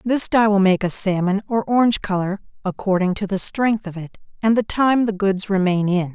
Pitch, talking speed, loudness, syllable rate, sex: 200 Hz, 215 wpm, -19 LUFS, 5.2 syllables/s, female